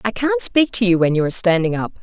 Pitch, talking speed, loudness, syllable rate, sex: 185 Hz, 295 wpm, -17 LUFS, 6.5 syllables/s, female